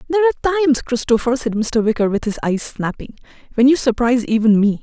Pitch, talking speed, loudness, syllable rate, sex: 245 Hz, 200 wpm, -17 LUFS, 7.4 syllables/s, female